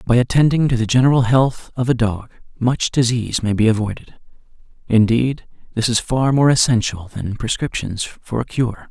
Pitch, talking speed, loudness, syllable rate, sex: 120 Hz, 170 wpm, -18 LUFS, 5.1 syllables/s, male